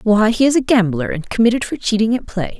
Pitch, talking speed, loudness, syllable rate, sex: 220 Hz, 255 wpm, -16 LUFS, 6.0 syllables/s, female